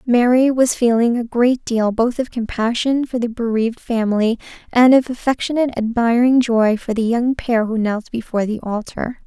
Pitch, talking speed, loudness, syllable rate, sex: 235 Hz, 175 wpm, -17 LUFS, 5.0 syllables/s, female